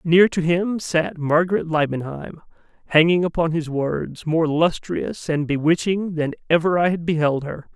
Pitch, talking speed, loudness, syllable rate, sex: 165 Hz, 140 wpm, -20 LUFS, 4.5 syllables/s, male